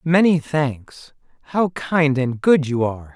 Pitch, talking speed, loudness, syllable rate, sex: 145 Hz, 135 wpm, -19 LUFS, 3.8 syllables/s, male